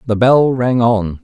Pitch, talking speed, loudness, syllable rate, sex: 115 Hz, 195 wpm, -13 LUFS, 3.8 syllables/s, male